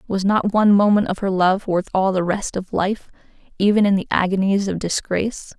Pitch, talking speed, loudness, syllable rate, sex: 195 Hz, 205 wpm, -19 LUFS, 5.4 syllables/s, female